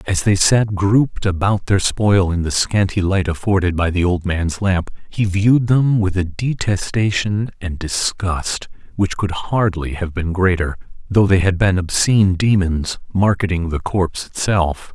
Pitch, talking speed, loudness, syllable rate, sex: 95 Hz, 165 wpm, -18 LUFS, 4.3 syllables/s, male